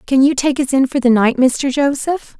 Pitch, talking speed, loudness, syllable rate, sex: 270 Hz, 250 wpm, -15 LUFS, 4.9 syllables/s, female